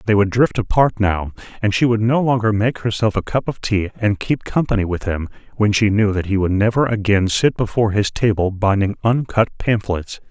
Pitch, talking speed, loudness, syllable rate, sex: 105 Hz, 210 wpm, -18 LUFS, 5.3 syllables/s, male